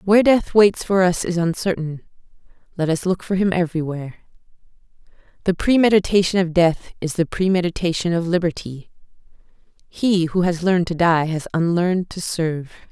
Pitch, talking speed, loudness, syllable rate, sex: 175 Hz, 150 wpm, -19 LUFS, 5.5 syllables/s, female